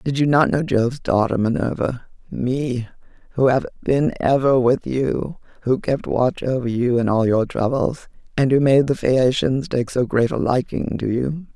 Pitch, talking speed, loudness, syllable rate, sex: 130 Hz, 175 wpm, -20 LUFS, 4.5 syllables/s, female